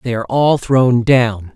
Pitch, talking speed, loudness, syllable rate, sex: 120 Hz, 195 wpm, -14 LUFS, 4.1 syllables/s, male